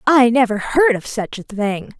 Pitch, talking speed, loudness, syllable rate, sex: 235 Hz, 210 wpm, -17 LUFS, 4.3 syllables/s, female